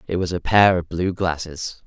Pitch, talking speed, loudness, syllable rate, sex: 90 Hz, 225 wpm, -20 LUFS, 4.8 syllables/s, male